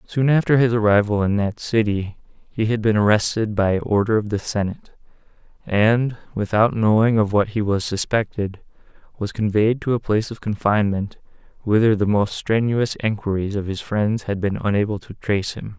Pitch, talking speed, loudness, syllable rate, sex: 105 Hz, 170 wpm, -20 LUFS, 5.1 syllables/s, male